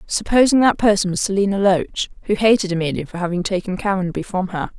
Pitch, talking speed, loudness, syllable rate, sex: 195 Hz, 190 wpm, -18 LUFS, 6.1 syllables/s, female